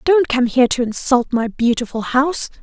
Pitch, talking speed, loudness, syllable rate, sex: 260 Hz, 185 wpm, -17 LUFS, 5.4 syllables/s, female